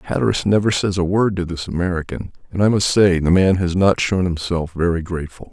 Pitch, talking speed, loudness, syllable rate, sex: 90 Hz, 215 wpm, -18 LUFS, 5.8 syllables/s, male